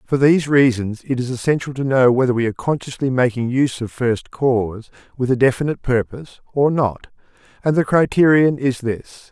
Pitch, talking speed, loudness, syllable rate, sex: 130 Hz, 180 wpm, -18 LUFS, 5.6 syllables/s, male